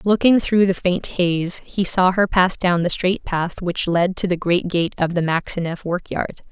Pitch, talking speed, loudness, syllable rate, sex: 180 Hz, 220 wpm, -19 LUFS, 4.4 syllables/s, female